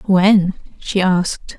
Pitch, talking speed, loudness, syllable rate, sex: 190 Hz, 115 wpm, -16 LUFS, 3.1 syllables/s, female